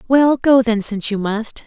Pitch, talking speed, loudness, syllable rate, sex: 235 Hz, 215 wpm, -16 LUFS, 4.6 syllables/s, female